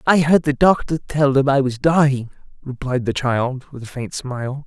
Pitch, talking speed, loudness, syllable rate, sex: 135 Hz, 205 wpm, -18 LUFS, 4.7 syllables/s, male